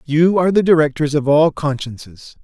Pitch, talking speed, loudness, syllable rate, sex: 150 Hz, 170 wpm, -15 LUFS, 5.2 syllables/s, male